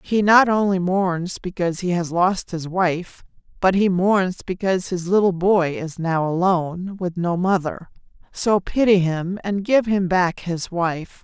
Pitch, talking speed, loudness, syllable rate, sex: 185 Hz, 170 wpm, -20 LUFS, 4.1 syllables/s, female